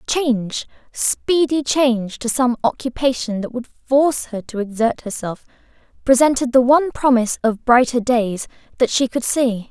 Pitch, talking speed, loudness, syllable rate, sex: 245 Hz, 150 wpm, -18 LUFS, 4.7 syllables/s, female